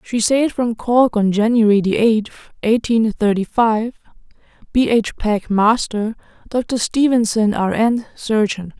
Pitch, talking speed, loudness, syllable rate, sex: 220 Hz, 130 wpm, -17 LUFS, 3.9 syllables/s, female